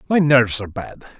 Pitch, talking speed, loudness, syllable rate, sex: 125 Hz, 200 wpm, -16 LUFS, 6.7 syllables/s, male